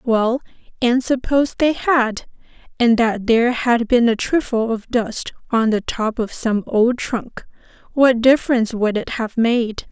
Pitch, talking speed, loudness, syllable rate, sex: 235 Hz, 165 wpm, -18 LUFS, 4.2 syllables/s, female